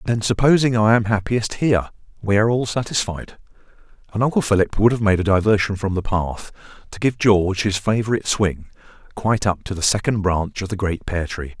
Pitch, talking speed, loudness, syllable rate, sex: 105 Hz, 195 wpm, -19 LUFS, 5.8 syllables/s, male